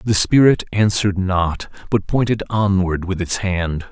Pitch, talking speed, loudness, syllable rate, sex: 95 Hz, 155 wpm, -18 LUFS, 4.4 syllables/s, male